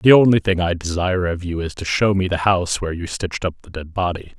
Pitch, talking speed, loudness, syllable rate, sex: 90 Hz, 275 wpm, -20 LUFS, 6.2 syllables/s, male